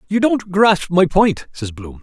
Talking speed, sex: 210 wpm, male